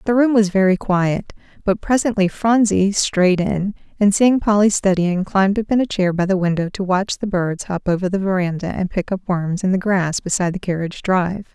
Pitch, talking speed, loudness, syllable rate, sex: 195 Hz, 215 wpm, -18 LUFS, 5.3 syllables/s, female